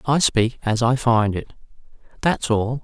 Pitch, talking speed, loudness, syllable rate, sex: 120 Hz, 170 wpm, -20 LUFS, 4.1 syllables/s, male